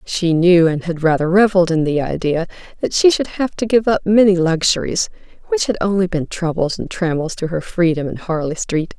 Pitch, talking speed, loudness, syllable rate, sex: 180 Hz, 205 wpm, -17 LUFS, 5.3 syllables/s, female